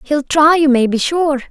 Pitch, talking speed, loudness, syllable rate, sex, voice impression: 285 Hz, 240 wpm, -13 LUFS, 4.4 syllables/s, female, feminine, slightly young, cute, slightly refreshing, friendly, slightly lively, slightly kind